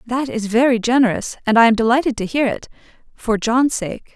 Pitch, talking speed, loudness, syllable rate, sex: 235 Hz, 190 wpm, -17 LUFS, 5.6 syllables/s, female